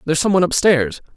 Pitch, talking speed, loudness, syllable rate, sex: 160 Hz, 260 wpm, -16 LUFS, 7.8 syllables/s, male